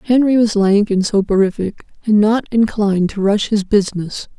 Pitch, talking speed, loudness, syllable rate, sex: 205 Hz, 165 wpm, -15 LUFS, 5.0 syllables/s, female